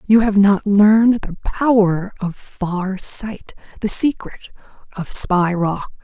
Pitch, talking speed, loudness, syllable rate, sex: 200 Hz, 140 wpm, -17 LUFS, 3.6 syllables/s, female